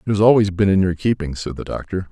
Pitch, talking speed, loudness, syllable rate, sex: 95 Hz, 285 wpm, -18 LUFS, 6.6 syllables/s, male